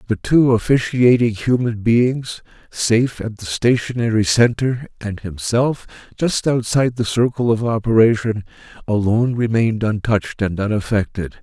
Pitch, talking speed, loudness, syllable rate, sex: 115 Hz, 120 wpm, -18 LUFS, 4.8 syllables/s, male